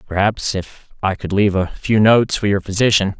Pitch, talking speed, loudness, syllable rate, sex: 100 Hz, 205 wpm, -17 LUFS, 5.5 syllables/s, male